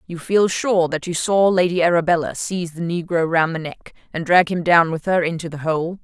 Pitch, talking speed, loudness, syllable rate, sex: 170 Hz, 230 wpm, -19 LUFS, 5.3 syllables/s, female